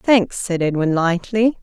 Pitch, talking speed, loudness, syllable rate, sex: 190 Hz, 150 wpm, -18 LUFS, 3.8 syllables/s, female